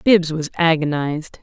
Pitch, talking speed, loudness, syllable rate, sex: 160 Hz, 125 wpm, -19 LUFS, 4.4 syllables/s, female